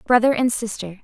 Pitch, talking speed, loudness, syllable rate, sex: 230 Hz, 175 wpm, -20 LUFS, 5.8 syllables/s, female